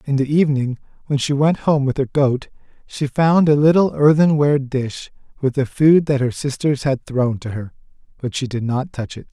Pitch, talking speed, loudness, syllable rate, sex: 140 Hz, 205 wpm, -18 LUFS, 5.0 syllables/s, male